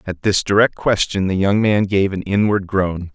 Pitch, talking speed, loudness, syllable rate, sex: 100 Hz, 210 wpm, -17 LUFS, 4.6 syllables/s, male